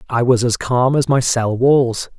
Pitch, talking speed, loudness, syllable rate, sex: 125 Hz, 220 wpm, -16 LUFS, 4.1 syllables/s, male